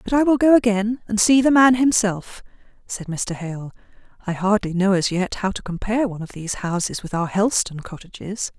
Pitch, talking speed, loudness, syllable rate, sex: 205 Hz, 205 wpm, -20 LUFS, 5.5 syllables/s, female